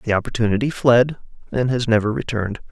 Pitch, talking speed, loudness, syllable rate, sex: 115 Hz, 155 wpm, -19 LUFS, 6.3 syllables/s, male